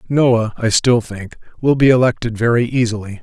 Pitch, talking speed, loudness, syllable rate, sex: 115 Hz, 165 wpm, -15 LUFS, 5.0 syllables/s, male